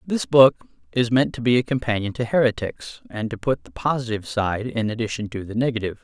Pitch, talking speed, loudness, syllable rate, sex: 120 Hz, 210 wpm, -22 LUFS, 6.0 syllables/s, male